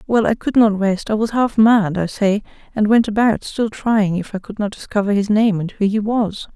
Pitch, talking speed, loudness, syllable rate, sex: 210 Hz, 245 wpm, -17 LUFS, 5.0 syllables/s, female